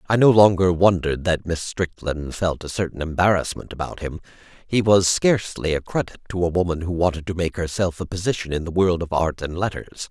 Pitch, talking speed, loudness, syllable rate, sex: 90 Hz, 210 wpm, -21 LUFS, 5.6 syllables/s, male